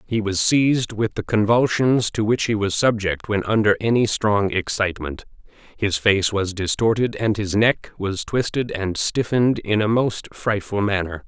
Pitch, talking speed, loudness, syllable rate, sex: 105 Hz, 170 wpm, -20 LUFS, 4.6 syllables/s, male